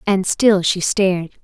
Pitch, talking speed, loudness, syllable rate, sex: 190 Hz, 165 wpm, -16 LUFS, 4.2 syllables/s, female